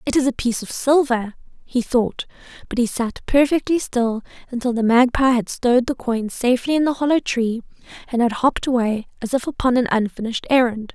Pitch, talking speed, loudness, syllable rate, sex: 245 Hz, 190 wpm, -20 LUFS, 5.7 syllables/s, female